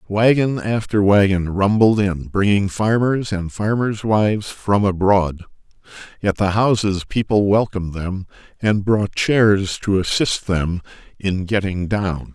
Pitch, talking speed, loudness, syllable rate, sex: 100 Hz, 130 wpm, -18 LUFS, 4.0 syllables/s, male